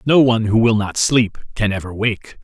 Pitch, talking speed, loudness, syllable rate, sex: 110 Hz, 220 wpm, -17 LUFS, 5.1 syllables/s, male